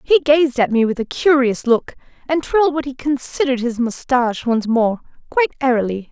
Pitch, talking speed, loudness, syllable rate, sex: 260 Hz, 185 wpm, -17 LUFS, 5.5 syllables/s, female